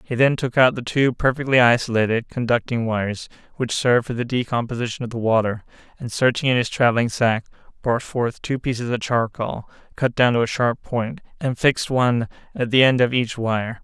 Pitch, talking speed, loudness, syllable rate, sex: 120 Hz, 195 wpm, -21 LUFS, 5.5 syllables/s, male